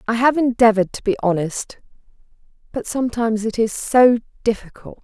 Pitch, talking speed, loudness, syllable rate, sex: 230 Hz, 145 wpm, -19 LUFS, 5.8 syllables/s, female